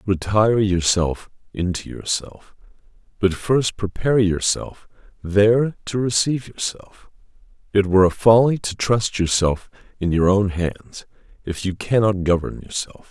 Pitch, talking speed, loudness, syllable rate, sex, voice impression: 100 Hz, 130 wpm, -20 LUFS, 4.4 syllables/s, male, masculine, adult-like, thick, tensed, powerful, hard, slightly halting, intellectual, calm, mature, reassuring, wild, lively, kind, slightly modest